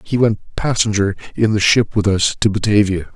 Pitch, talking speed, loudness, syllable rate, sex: 105 Hz, 190 wpm, -16 LUFS, 5.0 syllables/s, male